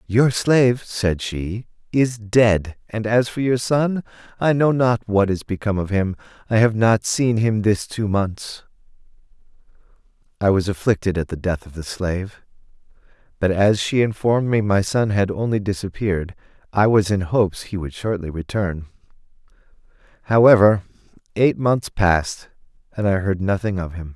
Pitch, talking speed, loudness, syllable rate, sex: 105 Hz, 160 wpm, -20 LUFS, 4.7 syllables/s, male